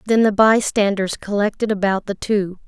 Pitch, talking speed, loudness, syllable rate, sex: 205 Hz, 155 wpm, -18 LUFS, 4.9 syllables/s, female